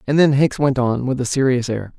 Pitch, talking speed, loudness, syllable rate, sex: 130 Hz, 270 wpm, -18 LUFS, 5.5 syllables/s, male